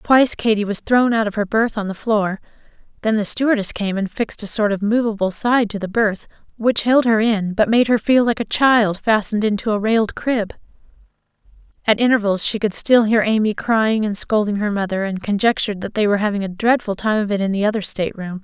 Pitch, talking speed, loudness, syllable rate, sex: 215 Hz, 220 wpm, -18 LUFS, 5.8 syllables/s, female